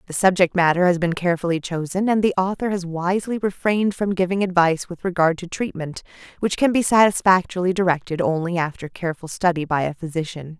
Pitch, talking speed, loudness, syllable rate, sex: 180 Hz, 180 wpm, -21 LUFS, 6.2 syllables/s, female